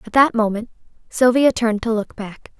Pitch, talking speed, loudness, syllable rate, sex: 230 Hz, 185 wpm, -18 LUFS, 5.4 syllables/s, female